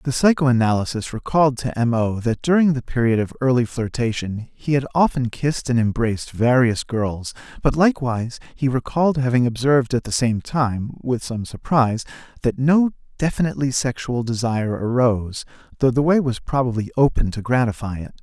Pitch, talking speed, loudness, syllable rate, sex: 125 Hz, 160 wpm, -20 LUFS, 5.5 syllables/s, male